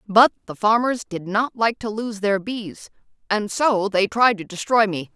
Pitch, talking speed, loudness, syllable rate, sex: 210 Hz, 200 wpm, -21 LUFS, 4.3 syllables/s, female